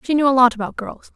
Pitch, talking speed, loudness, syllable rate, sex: 255 Hz, 310 wpm, -17 LUFS, 6.7 syllables/s, female